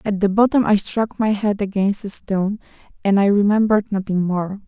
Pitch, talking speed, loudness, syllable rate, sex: 205 Hz, 190 wpm, -19 LUFS, 5.4 syllables/s, female